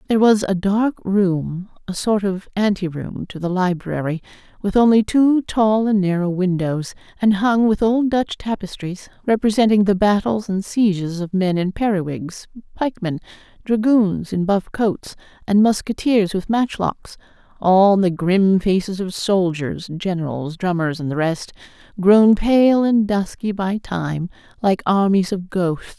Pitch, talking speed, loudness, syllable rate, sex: 195 Hz, 150 wpm, -19 LUFS, 4.2 syllables/s, female